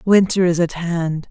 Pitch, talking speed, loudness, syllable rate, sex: 175 Hz, 185 wpm, -18 LUFS, 4.2 syllables/s, female